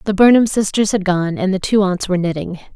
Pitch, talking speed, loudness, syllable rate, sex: 195 Hz, 240 wpm, -16 LUFS, 6.0 syllables/s, female